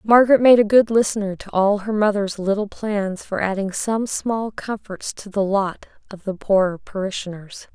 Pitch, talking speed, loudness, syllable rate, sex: 205 Hz, 180 wpm, -20 LUFS, 4.8 syllables/s, female